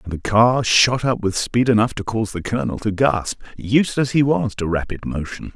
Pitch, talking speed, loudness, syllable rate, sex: 110 Hz, 225 wpm, -19 LUFS, 5.1 syllables/s, male